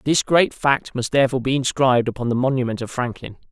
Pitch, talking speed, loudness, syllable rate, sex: 130 Hz, 205 wpm, -20 LUFS, 6.4 syllables/s, male